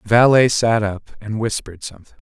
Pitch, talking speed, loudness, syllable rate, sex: 110 Hz, 185 wpm, -17 LUFS, 5.8 syllables/s, male